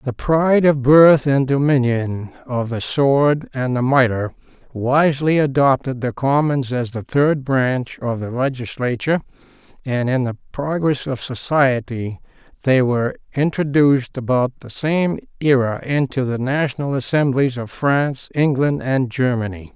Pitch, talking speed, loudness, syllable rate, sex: 135 Hz, 135 wpm, -18 LUFS, 4.4 syllables/s, male